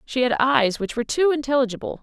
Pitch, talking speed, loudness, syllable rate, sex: 245 Hz, 210 wpm, -21 LUFS, 6.4 syllables/s, female